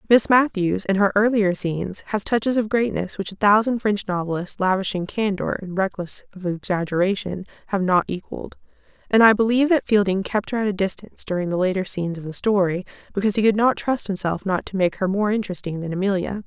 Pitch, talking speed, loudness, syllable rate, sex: 195 Hz, 200 wpm, -21 LUFS, 6.0 syllables/s, female